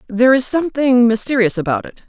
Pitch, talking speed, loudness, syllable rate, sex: 235 Hz, 175 wpm, -15 LUFS, 6.6 syllables/s, female